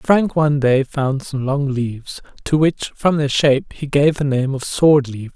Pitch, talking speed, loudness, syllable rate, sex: 140 Hz, 215 wpm, -17 LUFS, 4.6 syllables/s, male